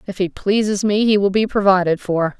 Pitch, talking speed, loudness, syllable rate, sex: 195 Hz, 225 wpm, -17 LUFS, 5.3 syllables/s, female